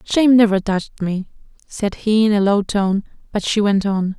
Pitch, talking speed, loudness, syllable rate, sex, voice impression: 205 Hz, 200 wpm, -18 LUFS, 5.1 syllables/s, female, very feminine, very adult-like, thin, tensed, slightly weak, slightly dark, soft, clear, fluent, slightly raspy, cute, very intellectual, refreshing, very sincere, calm, very friendly, reassuring, unique, elegant, slightly wild, sweet, lively, kind, modest, slightly light